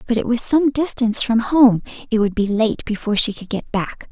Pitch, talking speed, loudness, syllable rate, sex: 230 Hz, 235 wpm, -18 LUFS, 5.5 syllables/s, female